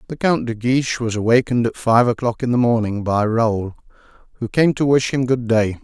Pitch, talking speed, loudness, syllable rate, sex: 120 Hz, 215 wpm, -18 LUFS, 5.4 syllables/s, male